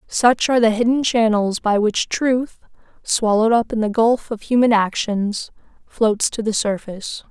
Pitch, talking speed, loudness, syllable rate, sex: 225 Hz, 165 wpm, -18 LUFS, 4.6 syllables/s, female